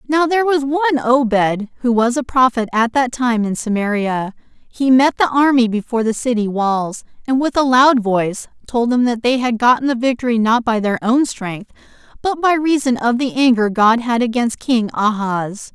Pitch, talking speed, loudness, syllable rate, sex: 240 Hz, 195 wpm, -16 LUFS, 5.0 syllables/s, female